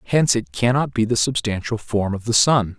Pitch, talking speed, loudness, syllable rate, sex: 115 Hz, 215 wpm, -19 LUFS, 5.3 syllables/s, male